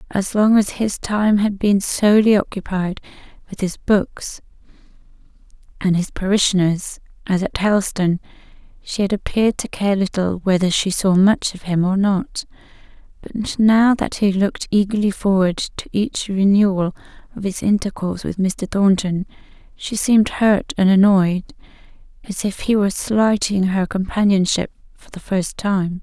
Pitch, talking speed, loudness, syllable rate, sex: 195 Hz, 150 wpm, -18 LUFS, 4.6 syllables/s, female